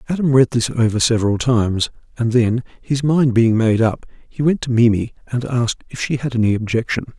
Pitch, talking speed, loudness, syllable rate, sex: 120 Hz, 200 wpm, -18 LUFS, 5.6 syllables/s, male